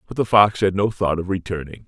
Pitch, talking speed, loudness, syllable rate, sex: 95 Hz, 255 wpm, -20 LUFS, 5.9 syllables/s, male